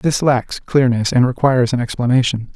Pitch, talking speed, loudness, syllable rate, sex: 125 Hz, 165 wpm, -16 LUFS, 5.2 syllables/s, male